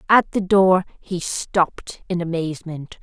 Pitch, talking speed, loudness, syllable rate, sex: 180 Hz, 140 wpm, -20 LUFS, 4.0 syllables/s, female